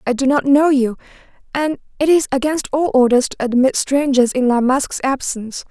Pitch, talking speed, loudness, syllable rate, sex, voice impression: 265 Hz, 190 wpm, -16 LUFS, 5.4 syllables/s, female, very feminine, slightly adult-like, slightly thin, relaxed, powerful, slightly bright, hard, very muffled, very raspy, cute, intellectual, very refreshing, sincere, slightly calm, very friendly, reassuring, very unique, slightly elegant, very wild, sweet, very lively, slightly kind, intense, sharp, light